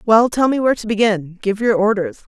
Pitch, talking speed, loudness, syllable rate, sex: 215 Hz, 230 wpm, -17 LUFS, 5.7 syllables/s, female